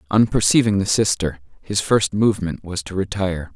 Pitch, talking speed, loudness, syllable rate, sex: 95 Hz, 170 wpm, -19 LUFS, 5.4 syllables/s, male